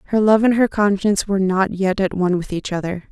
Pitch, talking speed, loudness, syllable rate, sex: 195 Hz, 250 wpm, -18 LUFS, 6.4 syllables/s, female